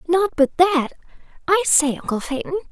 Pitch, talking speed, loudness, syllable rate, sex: 330 Hz, 135 wpm, -19 LUFS, 5.1 syllables/s, female